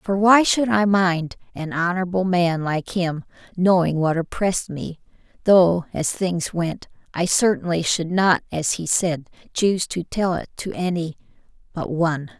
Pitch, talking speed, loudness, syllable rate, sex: 175 Hz, 160 wpm, -21 LUFS, 4.4 syllables/s, female